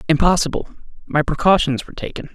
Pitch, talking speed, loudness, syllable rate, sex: 160 Hz, 130 wpm, -19 LUFS, 6.7 syllables/s, male